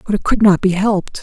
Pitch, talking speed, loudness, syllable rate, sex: 195 Hz, 295 wpm, -15 LUFS, 6.3 syllables/s, female